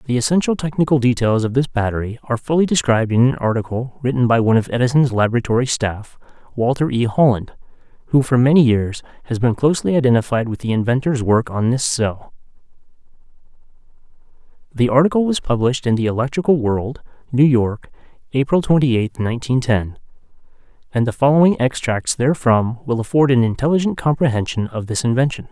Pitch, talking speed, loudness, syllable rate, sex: 125 Hz, 155 wpm, -17 LUFS, 6.1 syllables/s, male